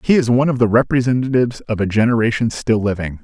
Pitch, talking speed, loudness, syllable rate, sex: 115 Hz, 205 wpm, -17 LUFS, 6.7 syllables/s, male